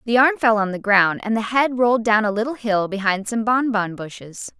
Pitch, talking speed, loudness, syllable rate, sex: 220 Hz, 235 wpm, -19 LUFS, 5.3 syllables/s, female